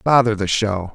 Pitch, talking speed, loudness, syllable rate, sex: 105 Hz, 190 wpm, -18 LUFS, 4.4 syllables/s, male